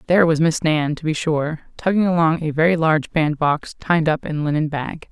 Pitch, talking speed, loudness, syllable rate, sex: 160 Hz, 225 wpm, -19 LUFS, 5.2 syllables/s, female